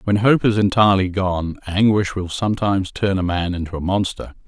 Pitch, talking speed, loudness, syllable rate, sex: 95 Hz, 190 wpm, -19 LUFS, 5.5 syllables/s, male